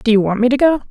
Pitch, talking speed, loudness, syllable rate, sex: 240 Hz, 400 wpm, -14 LUFS, 7.6 syllables/s, female